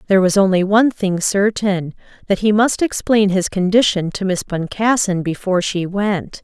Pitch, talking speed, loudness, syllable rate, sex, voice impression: 195 Hz, 160 wpm, -17 LUFS, 4.9 syllables/s, female, very feminine, slightly middle-aged, slightly thin, slightly relaxed, powerful, bright, slightly hard, very clear, very fluent, cute, intellectual, refreshing, sincere, calm, friendly, reassuring, unique, elegant, slightly wild, sweet, slightly lively, kind, slightly sharp